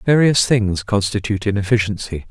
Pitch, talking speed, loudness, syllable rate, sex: 105 Hz, 105 wpm, -18 LUFS, 5.5 syllables/s, male